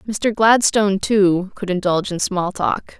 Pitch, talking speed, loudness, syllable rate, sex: 195 Hz, 160 wpm, -18 LUFS, 4.5 syllables/s, female